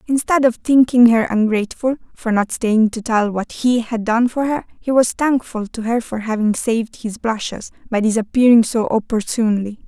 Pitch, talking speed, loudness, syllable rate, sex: 230 Hz, 180 wpm, -17 LUFS, 5.0 syllables/s, female